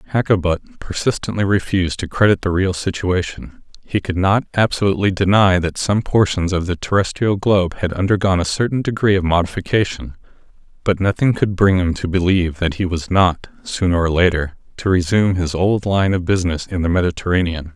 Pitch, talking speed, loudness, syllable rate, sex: 95 Hz, 170 wpm, -18 LUFS, 5.7 syllables/s, male